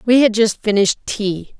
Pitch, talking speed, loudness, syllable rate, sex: 215 Hz, 190 wpm, -16 LUFS, 5.1 syllables/s, female